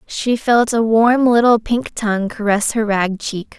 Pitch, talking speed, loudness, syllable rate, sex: 220 Hz, 185 wpm, -16 LUFS, 4.4 syllables/s, female